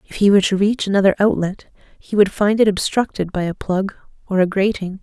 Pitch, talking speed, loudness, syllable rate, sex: 200 Hz, 215 wpm, -18 LUFS, 5.9 syllables/s, female